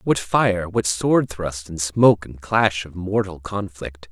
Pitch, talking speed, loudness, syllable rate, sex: 95 Hz, 175 wpm, -21 LUFS, 3.7 syllables/s, male